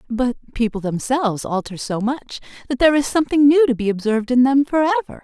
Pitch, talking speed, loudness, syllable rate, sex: 250 Hz, 205 wpm, -18 LUFS, 6.3 syllables/s, female